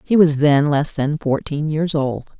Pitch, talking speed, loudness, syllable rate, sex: 150 Hz, 200 wpm, -18 LUFS, 4.0 syllables/s, female